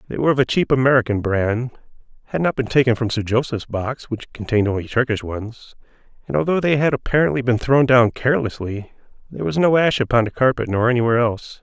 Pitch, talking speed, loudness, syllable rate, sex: 120 Hz, 200 wpm, -19 LUFS, 6.4 syllables/s, male